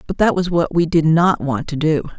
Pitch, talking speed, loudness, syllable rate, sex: 160 Hz, 275 wpm, -17 LUFS, 5.0 syllables/s, female